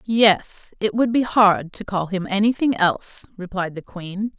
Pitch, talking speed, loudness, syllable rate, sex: 200 Hz, 180 wpm, -20 LUFS, 4.1 syllables/s, female